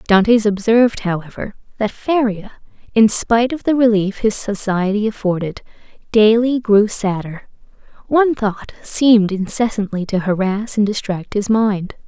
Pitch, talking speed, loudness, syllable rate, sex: 215 Hz, 130 wpm, -16 LUFS, 4.7 syllables/s, female